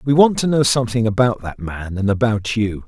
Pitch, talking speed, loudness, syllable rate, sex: 115 Hz, 210 wpm, -18 LUFS, 5.5 syllables/s, male